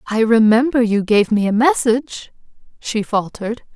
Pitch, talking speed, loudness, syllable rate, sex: 230 Hz, 145 wpm, -16 LUFS, 4.8 syllables/s, female